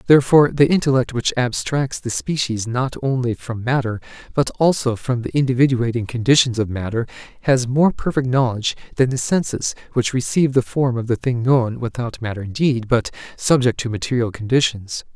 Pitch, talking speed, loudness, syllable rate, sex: 125 Hz, 165 wpm, -19 LUFS, 5.5 syllables/s, male